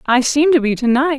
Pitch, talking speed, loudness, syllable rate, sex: 270 Hz, 305 wpm, -15 LUFS, 5.4 syllables/s, female